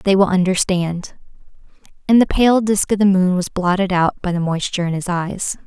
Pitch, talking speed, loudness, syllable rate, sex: 185 Hz, 200 wpm, -17 LUFS, 5.1 syllables/s, female